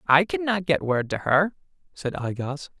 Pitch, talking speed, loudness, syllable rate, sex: 155 Hz, 195 wpm, -24 LUFS, 4.5 syllables/s, male